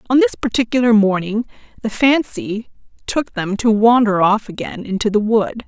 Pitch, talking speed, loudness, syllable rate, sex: 220 Hz, 160 wpm, -17 LUFS, 4.8 syllables/s, female